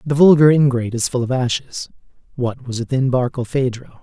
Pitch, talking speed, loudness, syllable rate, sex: 130 Hz, 165 wpm, -17 LUFS, 5.6 syllables/s, male